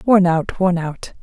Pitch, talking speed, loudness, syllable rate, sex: 180 Hz, 195 wpm, -18 LUFS, 3.8 syllables/s, female